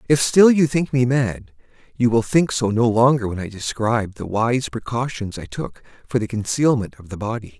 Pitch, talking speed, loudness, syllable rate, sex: 120 Hz, 205 wpm, -20 LUFS, 5.0 syllables/s, male